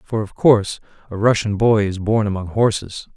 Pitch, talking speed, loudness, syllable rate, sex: 105 Hz, 190 wpm, -18 LUFS, 5.2 syllables/s, male